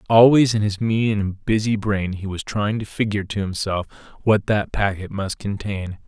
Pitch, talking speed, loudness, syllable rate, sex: 105 Hz, 190 wpm, -21 LUFS, 4.9 syllables/s, male